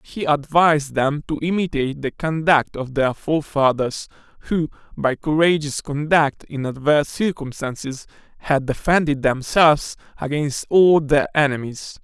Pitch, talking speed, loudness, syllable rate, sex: 150 Hz, 120 wpm, -20 LUFS, 4.6 syllables/s, male